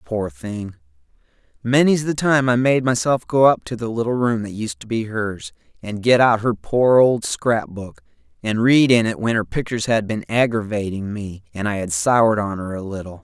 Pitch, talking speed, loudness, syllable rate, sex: 110 Hz, 210 wpm, -19 LUFS, 4.9 syllables/s, male